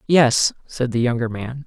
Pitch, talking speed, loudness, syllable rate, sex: 125 Hz, 180 wpm, -20 LUFS, 4.3 syllables/s, male